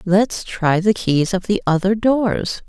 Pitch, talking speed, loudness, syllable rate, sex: 190 Hz, 180 wpm, -18 LUFS, 3.6 syllables/s, female